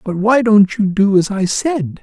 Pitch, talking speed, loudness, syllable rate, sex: 205 Hz, 235 wpm, -14 LUFS, 4.2 syllables/s, male